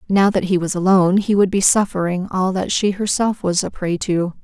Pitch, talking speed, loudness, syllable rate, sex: 190 Hz, 230 wpm, -18 LUFS, 5.2 syllables/s, female